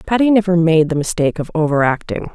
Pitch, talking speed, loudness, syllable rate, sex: 170 Hz, 205 wpm, -16 LUFS, 6.4 syllables/s, female